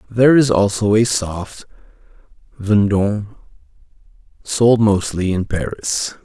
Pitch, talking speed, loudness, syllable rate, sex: 105 Hz, 95 wpm, -16 LUFS, 4.0 syllables/s, male